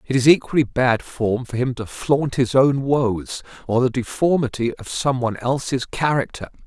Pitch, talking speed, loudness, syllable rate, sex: 130 Hz, 180 wpm, -20 LUFS, 4.7 syllables/s, male